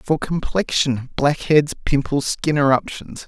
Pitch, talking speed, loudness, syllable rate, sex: 145 Hz, 110 wpm, -19 LUFS, 3.9 syllables/s, male